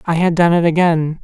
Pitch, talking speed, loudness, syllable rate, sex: 170 Hz, 245 wpm, -14 LUFS, 5.5 syllables/s, male